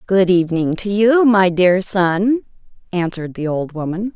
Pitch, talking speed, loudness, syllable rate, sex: 190 Hz, 160 wpm, -16 LUFS, 4.6 syllables/s, female